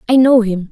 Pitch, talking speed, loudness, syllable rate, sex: 225 Hz, 250 wpm, -12 LUFS, 5.7 syllables/s, female